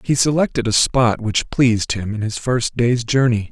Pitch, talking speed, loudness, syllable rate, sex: 120 Hz, 205 wpm, -18 LUFS, 4.7 syllables/s, male